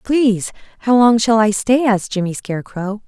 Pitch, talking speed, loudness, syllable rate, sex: 220 Hz, 175 wpm, -16 LUFS, 5.4 syllables/s, female